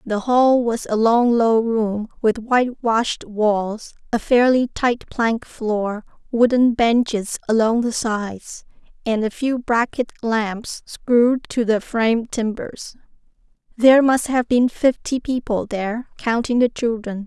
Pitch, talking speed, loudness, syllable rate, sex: 230 Hz, 140 wpm, -19 LUFS, 3.9 syllables/s, female